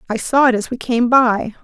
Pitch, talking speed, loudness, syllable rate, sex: 240 Hz, 255 wpm, -15 LUFS, 5.1 syllables/s, female